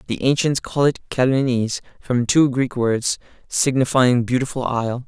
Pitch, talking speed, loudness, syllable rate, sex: 125 Hz, 140 wpm, -20 LUFS, 5.1 syllables/s, male